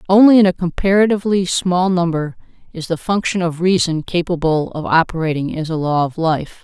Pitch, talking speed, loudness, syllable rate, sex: 175 Hz, 170 wpm, -16 LUFS, 5.4 syllables/s, female